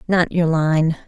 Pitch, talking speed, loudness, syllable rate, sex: 165 Hz, 170 wpm, -18 LUFS, 3.6 syllables/s, female